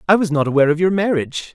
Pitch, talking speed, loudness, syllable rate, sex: 165 Hz, 270 wpm, -17 LUFS, 7.9 syllables/s, male